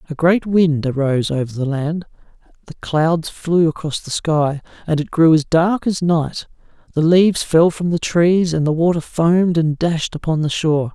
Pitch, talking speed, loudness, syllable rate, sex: 160 Hz, 190 wpm, -17 LUFS, 4.7 syllables/s, male